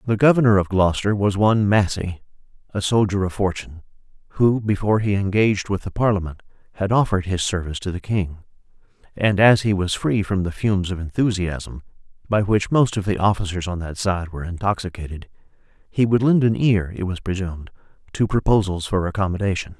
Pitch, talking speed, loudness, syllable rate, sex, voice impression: 100 Hz, 175 wpm, -20 LUFS, 6.0 syllables/s, male, masculine, adult-like, relaxed, weak, slightly dark, slightly muffled, intellectual, sincere, calm, reassuring, slightly wild, kind, modest